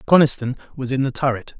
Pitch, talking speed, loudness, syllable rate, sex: 130 Hz, 190 wpm, -20 LUFS, 6.8 syllables/s, male